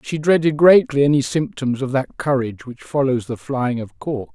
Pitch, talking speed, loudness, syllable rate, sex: 135 Hz, 195 wpm, -19 LUFS, 4.9 syllables/s, male